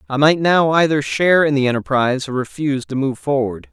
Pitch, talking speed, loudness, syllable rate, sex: 140 Hz, 210 wpm, -17 LUFS, 6.0 syllables/s, male